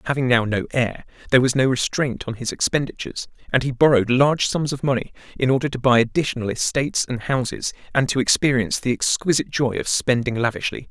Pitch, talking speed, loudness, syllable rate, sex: 130 Hz, 195 wpm, -20 LUFS, 6.4 syllables/s, male